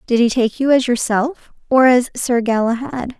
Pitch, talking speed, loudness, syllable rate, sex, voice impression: 250 Hz, 190 wpm, -16 LUFS, 4.6 syllables/s, female, feminine, slightly young, tensed, powerful, slightly soft, clear, fluent, intellectual, friendly, elegant, slightly kind, slightly modest